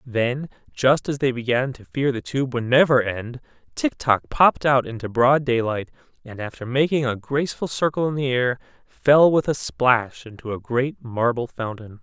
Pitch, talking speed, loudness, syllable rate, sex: 125 Hz, 185 wpm, -21 LUFS, 4.7 syllables/s, male